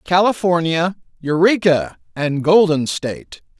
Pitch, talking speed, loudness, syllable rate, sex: 170 Hz, 85 wpm, -17 LUFS, 4.1 syllables/s, male